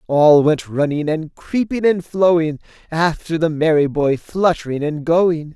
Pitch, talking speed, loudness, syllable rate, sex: 160 Hz, 150 wpm, -17 LUFS, 4.2 syllables/s, male